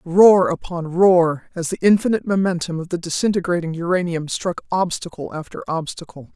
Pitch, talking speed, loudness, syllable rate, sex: 175 Hz, 140 wpm, -19 LUFS, 5.4 syllables/s, female